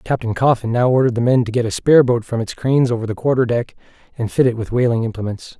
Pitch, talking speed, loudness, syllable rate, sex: 120 Hz, 255 wpm, -17 LUFS, 6.9 syllables/s, male